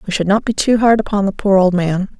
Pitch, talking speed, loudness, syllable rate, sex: 200 Hz, 300 wpm, -15 LUFS, 6.1 syllables/s, female